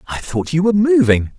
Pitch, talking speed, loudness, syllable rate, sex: 155 Hz, 215 wpm, -15 LUFS, 5.7 syllables/s, male